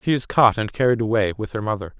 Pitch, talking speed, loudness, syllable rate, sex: 110 Hz, 240 wpm, -20 LUFS, 6.5 syllables/s, male